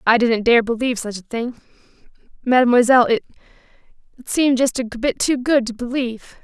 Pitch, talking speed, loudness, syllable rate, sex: 240 Hz, 150 wpm, -18 LUFS, 5.9 syllables/s, female